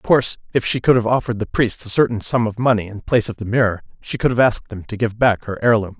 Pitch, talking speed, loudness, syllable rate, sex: 110 Hz, 290 wpm, -18 LUFS, 6.8 syllables/s, male